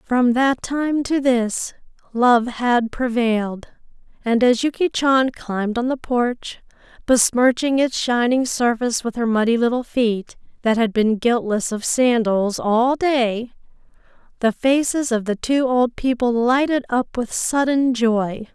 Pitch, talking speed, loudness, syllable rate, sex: 245 Hz, 145 wpm, -19 LUFS, 3.9 syllables/s, female